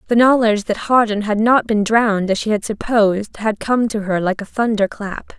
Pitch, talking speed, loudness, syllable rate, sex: 215 Hz, 210 wpm, -17 LUFS, 5.2 syllables/s, female